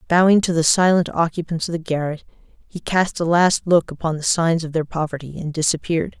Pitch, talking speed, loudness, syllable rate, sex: 165 Hz, 205 wpm, -19 LUFS, 5.4 syllables/s, female